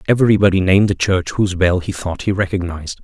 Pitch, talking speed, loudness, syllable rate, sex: 95 Hz, 200 wpm, -16 LUFS, 6.7 syllables/s, male